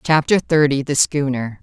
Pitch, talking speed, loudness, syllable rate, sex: 145 Hz, 150 wpm, -17 LUFS, 4.6 syllables/s, female